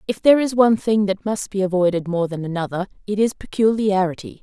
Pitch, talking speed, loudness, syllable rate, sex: 195 Hz, 205 wpm, -20 LUFS, 6.1 syllables/s, female